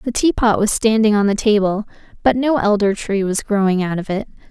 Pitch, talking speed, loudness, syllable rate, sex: 210 Hz, 225 wpm, -17 LUFS, 5.5 syllables/s, female